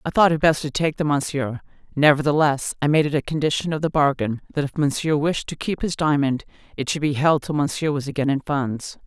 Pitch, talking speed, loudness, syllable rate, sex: 145 Hz, 230 wpm, -21 LUFS, 5.7 syllables/s, female